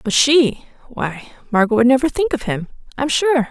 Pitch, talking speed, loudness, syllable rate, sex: 255 Hz, 170 wpm, -17 LUFS, 5.6 syllables/s, female